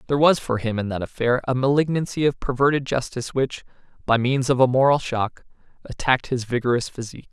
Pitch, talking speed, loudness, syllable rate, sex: 130 Hz, 190 wpm, -22 LUFS, 6.3 syllables/s, male